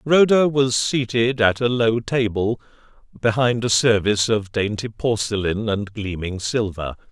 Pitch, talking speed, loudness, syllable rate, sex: 110 Hz, 135 wpm, -20 LUFS, 4.3 syllables/s, male